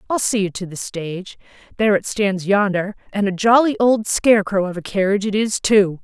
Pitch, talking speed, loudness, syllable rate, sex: 205 Hz, 200 wpm, -18 LUFS, 5.6 syllables/s, female